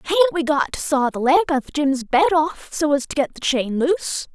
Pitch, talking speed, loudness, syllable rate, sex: 300 Hz, 250 wpm, -20 LUFS, 5.5 syllables/s, female